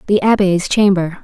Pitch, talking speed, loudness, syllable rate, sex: 190 Hz, 145 wpm, -14 LUFS, 4.8 syllables/s, female